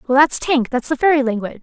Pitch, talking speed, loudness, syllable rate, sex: 270 Hz, 260 wpm, -17 LUFS, 7.2 syllables/s, female